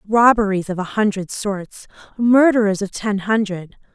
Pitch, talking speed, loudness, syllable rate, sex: 205 Hz, 135 wpm, -18 LUFS, 4.1 syllables/s, female